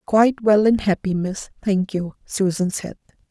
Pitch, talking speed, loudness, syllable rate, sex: 200 Hz, 165 wpm, -20 LUFS, 4.5 syllables/s, female